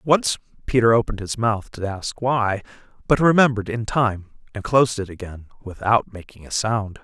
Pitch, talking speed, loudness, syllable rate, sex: 110 Hz, 170 wpm, -21 LUFS, 5.1 syllables/s, male